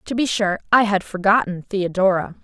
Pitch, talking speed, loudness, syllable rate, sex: 200 Hz, 170 wpm, -19 LUFS, 5.2 syllables/s, female